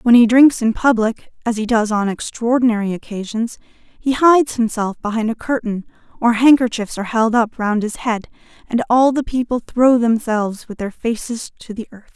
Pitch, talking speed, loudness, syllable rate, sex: 230 Hz, 185 wpm, -17 LUFS, 5.0 syllables/s, female